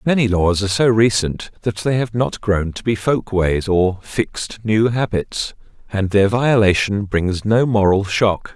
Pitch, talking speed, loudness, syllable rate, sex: 105 Hz, 175 wpm, -18 LUFS, 4.2 syllables/s, male